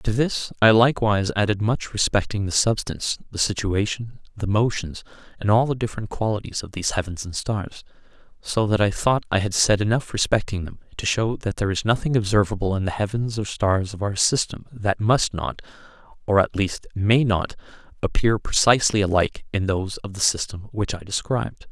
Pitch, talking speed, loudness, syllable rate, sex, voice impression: 105 Hz, 185 wpm, -22 LUFS, 5.5 syllables/s, male, masculine, adult-like, tensed, slightly powerful, clear, fluent, cool, calm, friendly, wild, lively, slightly kind, slightly modest